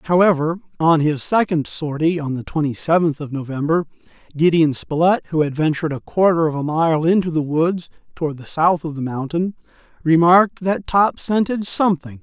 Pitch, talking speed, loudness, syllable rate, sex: 160 Hz, 170 wpm, -18 LUFS, 5.2 syllables/s, male